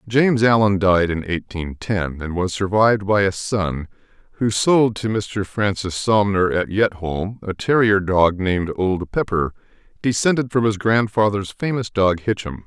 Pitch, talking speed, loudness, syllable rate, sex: 100 Hz, 155 wpm, -19 LUFS, 4.4 syllables/s, male